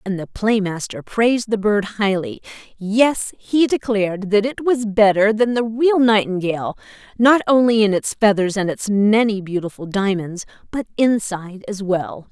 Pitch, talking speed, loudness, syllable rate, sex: 210 Hz, 160 wpm, -18 LUFS, 4.6 syllables/s, female